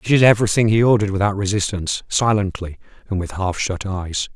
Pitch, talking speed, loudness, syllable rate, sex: 100 Hz, 180 wpm, -19 LUFS, 6.2 syllables/s, male